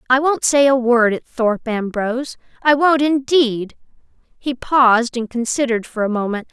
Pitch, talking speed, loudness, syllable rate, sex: 245 Hz, 165 wpm, -17 LUFS, 4.8 syllables/s, female